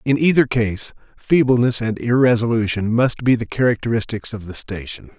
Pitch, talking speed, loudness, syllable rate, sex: 115 Hz, 150 wpm, -18 LUFS, 5.2 syllables/s, male